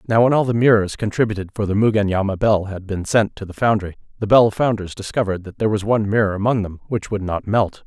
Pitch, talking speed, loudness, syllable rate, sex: 105 Hz, 235 wpm, -19 LUFS, 6.5 syllables/s, male